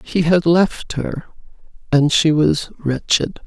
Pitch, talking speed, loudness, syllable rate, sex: 160 Hz, 140 wpm, -17 LUFS, 3.5 syllables/s, female